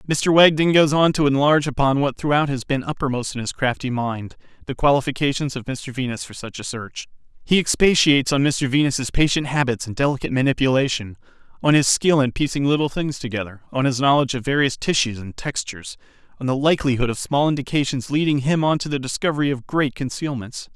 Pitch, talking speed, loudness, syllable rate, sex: 135 Hz, 190 wpm, -20 LUFS, 6.0 syllables/s, male